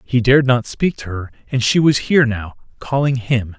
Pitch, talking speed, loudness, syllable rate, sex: 125 Hz, 200 wpm, -17 LUFS, 5.2 syllables/s, male